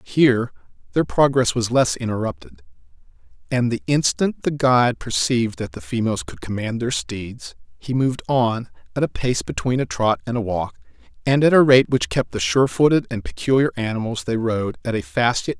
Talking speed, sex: 195 wpm, male